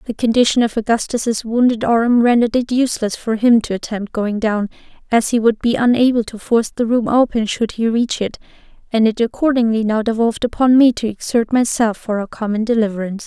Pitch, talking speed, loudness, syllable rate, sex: 230 Hz, 195 wpm, -16 LUFS, 5.8 syllables/s, female